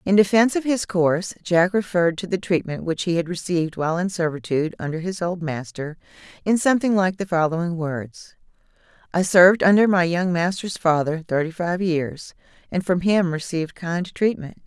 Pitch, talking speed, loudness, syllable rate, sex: 175 Hz, 175 wpm, -21 LUFS, 5.4 syllables/s, female